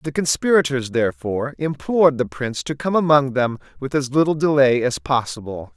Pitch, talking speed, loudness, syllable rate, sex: 135 Hz, 165 wpm, -19 LUFS, 5.5 syllables/s, male